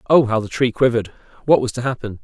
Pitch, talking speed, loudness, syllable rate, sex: 120 Hz, 240 wpm, -18 LUFS, 7.1 syllables/s, male